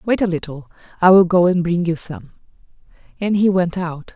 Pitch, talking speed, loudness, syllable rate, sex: 175 Hz, 200 wpm, -17 LUFS, 5.3 syllables/s, female